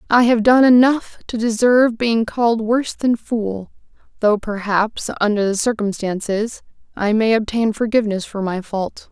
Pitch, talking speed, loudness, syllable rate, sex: 220 Hz, 150 wpm, -18 LUFS, 4.6 syllables/s, female